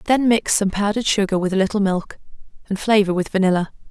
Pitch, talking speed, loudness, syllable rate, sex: 200 Hz, 200 wpm, -19 LUFS, 6.5 syllables/s, female